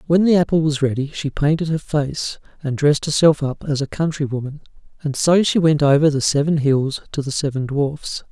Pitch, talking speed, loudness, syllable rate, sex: 145 Hz, 210 wpm, -19 LUFS, 5.3 syllables/s, male